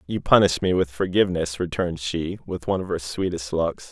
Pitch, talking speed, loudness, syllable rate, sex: 85 Hz, 200 wpm, -23 LUFS, 5.7 syllables/s, male